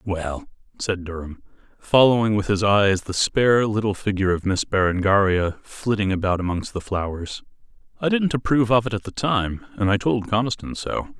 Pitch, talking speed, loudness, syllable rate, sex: 100 Hz, 170 wpm, -21 LUFS, 5.2 syllables/s, male